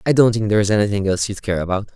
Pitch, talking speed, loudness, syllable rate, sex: 100 Hz, 310 wpm, -18 LUFS, 8.2 syllables/s, male